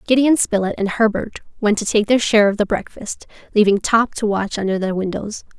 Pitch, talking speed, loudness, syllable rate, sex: 215 Hz, 205 wpm, -18 LUFS, 5.7 syllables/s, female